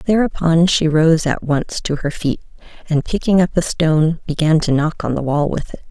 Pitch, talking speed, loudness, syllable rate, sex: 160 Hz, 215 wpm, -17 LUFS, 5.1 syllables/s, female